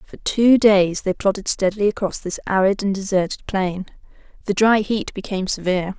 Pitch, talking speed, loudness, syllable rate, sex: 195 Hz, 170 wpm, -19 LUFS, 5.4 syllables/s, female